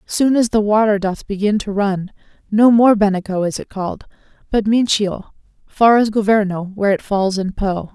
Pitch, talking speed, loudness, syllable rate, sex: 205 Hz, 180 wpm, -16 LUFS, 4.9 syllables/s, female